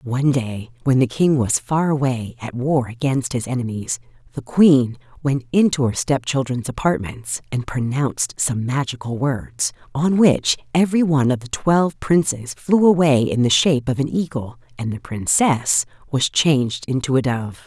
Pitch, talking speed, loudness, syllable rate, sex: 135 Hz, 165 wpm, -19 LUFS, 4.7 syllables/s, female